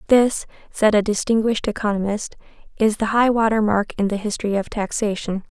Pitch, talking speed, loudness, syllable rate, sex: 215 Hz, 160 wpm, -20 LUFS, 5.7 syllables/s, female